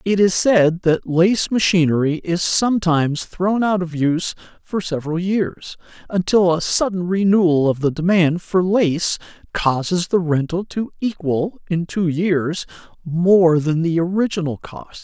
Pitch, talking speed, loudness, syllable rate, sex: 175 Hz, 150 wpm, -18 LUFS, 4.2 syllables/s, male